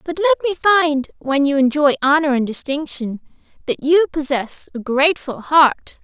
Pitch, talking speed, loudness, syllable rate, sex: 295 Hz, 160 wpm, -17 LUFS, 5.3 syllables/s, female